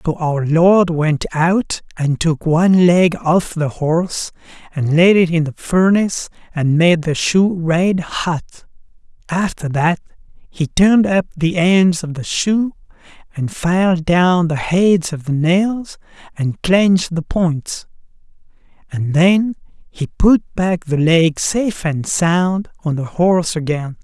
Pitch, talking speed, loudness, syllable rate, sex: 170 Hz, 150 wpm, -16 LUFS, 3.7 syllables/s, male